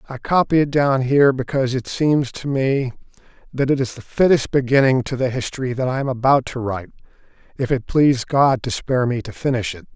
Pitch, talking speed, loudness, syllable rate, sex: 130 Hz, 210 wpm, -19 LUFS, 5.8 syllables/s, male